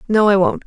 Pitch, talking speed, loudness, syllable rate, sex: 205 Hz, 270 wpm, -15 LUFS, 6.1 syllables/s, female